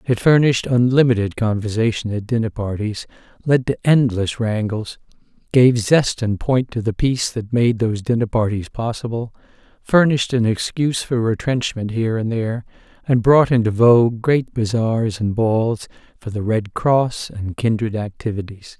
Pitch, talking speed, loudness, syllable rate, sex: 115 Hz, 150 wpm, -18 LUFS, 4.8 syllables/s, male